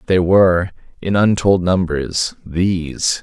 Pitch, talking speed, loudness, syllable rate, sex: 90 Hz, 95 wpm, -16 LUFS, 3.8 syllables/s, male